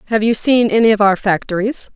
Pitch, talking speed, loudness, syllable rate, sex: 215 Hz, 215 wpm, -14 LUFS, 5.8 syllables/s, female